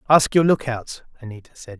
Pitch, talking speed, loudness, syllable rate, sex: 130 Hz, 165 wpm, -19 LUFS, 5.6 syllables/s, male